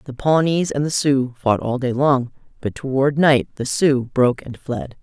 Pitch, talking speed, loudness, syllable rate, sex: 135 Hz, 190 wpm, -19 LUFS, 4.3 syllables/s, female